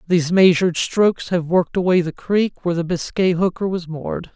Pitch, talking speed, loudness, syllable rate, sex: 175 Hz, 195 wpm, -19 LUFS, 5.7 syllables/s, male